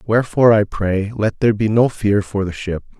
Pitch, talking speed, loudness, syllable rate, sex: 105 Hz, 220 wpm, -17 LUFS, 5.6 syllables/s, male